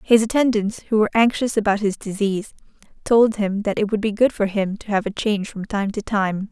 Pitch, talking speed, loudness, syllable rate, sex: 210 Hz, 230 wpm, -20 LUFS, 5.8 syllables/s, female